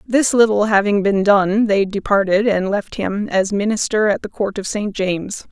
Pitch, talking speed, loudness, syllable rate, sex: 205 Hz, 195 wpm, -17 LUFS, 4.6 syllables/s, female